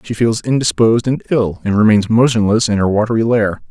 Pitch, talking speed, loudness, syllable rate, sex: 110 Hz, 195 wpm, -14 LUFS, 5.8 syllables/s, male